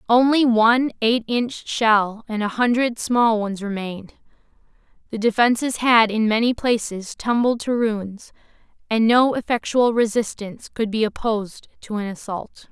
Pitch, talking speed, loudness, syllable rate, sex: 225 Hz, 140 wpm, -20 LUFS, 4.5 syllables/s, female